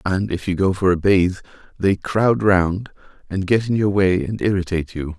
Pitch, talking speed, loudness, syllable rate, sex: 95 Hz, 210 wpm, -19 LUFS, 4.9 syllables/s, male